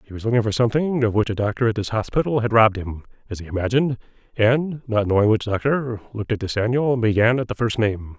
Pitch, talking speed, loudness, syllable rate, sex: 115 Hz, 240 wpm, -21 LUFS, 6.6 syllables/s, male